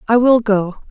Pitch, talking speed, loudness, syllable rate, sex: 220 Hz, 200 wpm, -14 LUFS, 4.8 syllables/s, female